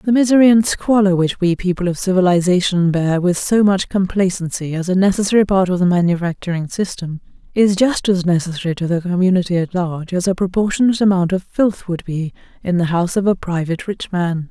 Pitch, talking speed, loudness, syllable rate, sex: 185 Hz, 195 wpm, -17 LUFS, 5.9 syllables/s, female